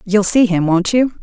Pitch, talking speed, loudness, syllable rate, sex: 205 Hz, 245 wpm, -14 LUFS, 4.7 syllables/s, female